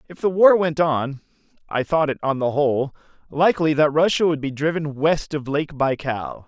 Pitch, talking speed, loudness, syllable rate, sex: 150 Hz, 195 wpm, -20 LUFS, 5.0 syllables/s, male